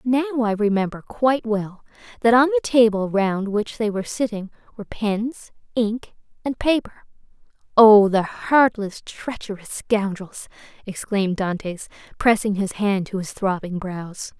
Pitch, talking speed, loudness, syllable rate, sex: 210 Hz, 140 wpm, -21 LUFS, 4.4 syllables/s, female